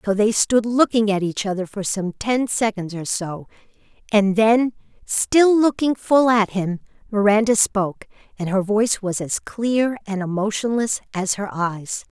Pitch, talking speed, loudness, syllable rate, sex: 210 Hz, 165 wpm, -20 LUFS, 4.3 syllables/s, female